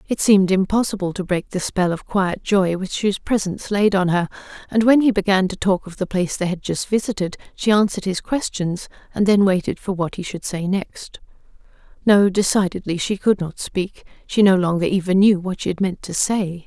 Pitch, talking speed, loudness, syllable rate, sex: 190 Hz, 210 wpm, -20 LUFS, 5.3 syllables/s, female